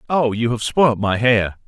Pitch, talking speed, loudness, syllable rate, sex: 120 Hz, 215 wpm, -18 LUFS, 4.2 syllables/s, male